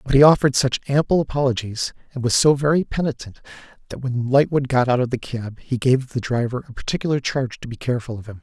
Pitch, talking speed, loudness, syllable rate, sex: 130 Hz, 220 wpm, -20 LUFS, 6.4 syllables/s, male